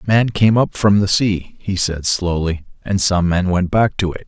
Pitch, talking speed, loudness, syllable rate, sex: 95 Hz, 225 wpm, -17 LUFS, 4.4 syllables/s, male